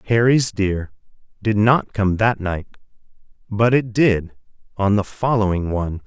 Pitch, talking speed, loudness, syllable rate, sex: 105 Hz, 140 wpm, -19 LUFS, 4.3 syllables/s, male